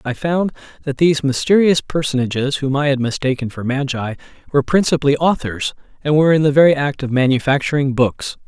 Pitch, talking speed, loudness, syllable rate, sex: 140 Hz, 170 wpm, -17 LUFS, 6.0 syllables/s, male